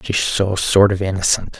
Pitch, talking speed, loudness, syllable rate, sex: 95 Hz, 190 wpm, -16 LUFS, 4.7 syllables/s, male